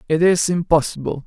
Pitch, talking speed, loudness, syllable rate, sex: 165 Hz, 145 wpm, -18 LUFS, 5.5 syllables/s, male